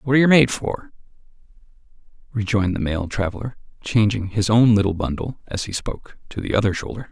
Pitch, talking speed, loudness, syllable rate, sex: 110 Hz, 175 wpm, -20 LUFS, 6.1 syllables/s, male